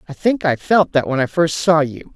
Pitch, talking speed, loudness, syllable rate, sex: 155 Hz, 280 wpm, -17 LUFS, 5.1 syllables/s, female